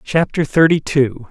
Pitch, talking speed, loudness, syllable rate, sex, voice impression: 145 Hz, 140 wpm, -15 LUFS, 4.1 syllables/s, male, masculine, slightly young, slightly calm